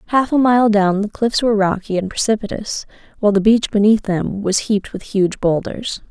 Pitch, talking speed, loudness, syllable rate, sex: 210 Hz, 195 wpm, -17 LUFS, 5.3 syllables/s, female